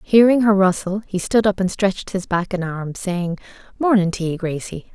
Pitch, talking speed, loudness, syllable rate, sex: 190 Hz, 195 wpm, -19 LUFS, 4.8 syllables/s, female